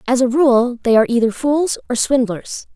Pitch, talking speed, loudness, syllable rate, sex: 250 Hz, 195 wpm, -16 LUFS, 4.9 syllables/s, female